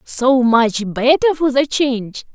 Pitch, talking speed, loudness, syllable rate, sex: 255 Hz, 155 wpm, -15 LUFS, 4.0 syllables/s, female